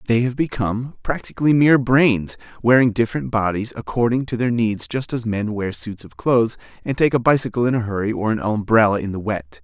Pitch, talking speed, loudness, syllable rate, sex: 115 Hz, 205 wpm, -19 LUFS, 5.7 syllables/s, male